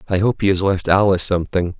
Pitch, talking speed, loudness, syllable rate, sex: 95 Hz, 235 wpm, -17 LUFS, 6.9 syllables/s, male